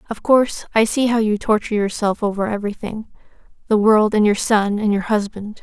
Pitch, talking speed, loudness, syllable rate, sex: 215 Hz, 180 wpm, -18 LUFS, 5.7 syllables/s, female